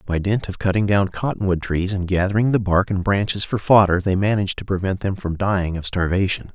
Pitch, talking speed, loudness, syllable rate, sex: 95 Hz, 220 wpm, -20 LUFS, 5.8 syllables/s, male